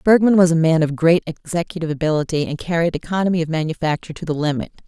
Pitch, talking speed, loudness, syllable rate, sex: 165 Hz, 195 wpm, -19 LUFS, 7.2 syllables/s, female